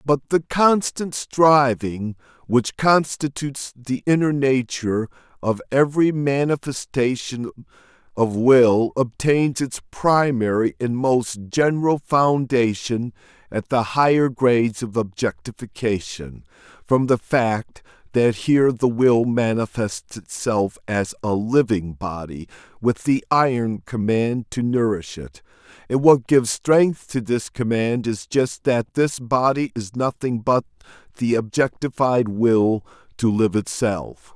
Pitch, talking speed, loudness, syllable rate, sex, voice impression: 120 Hz, 120 wpm, -20 LUFS, 3.9 syllables/s, male, masculine, middle-aged, tensed, powerful, clear, raspy, cool, intellectual, mature, slightly reassuring, wild, lively, strict